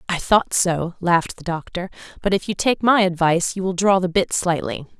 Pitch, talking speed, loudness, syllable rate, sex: 180 Hz, 215 wpm, -20 LUFS, 5.3 syllables/s, female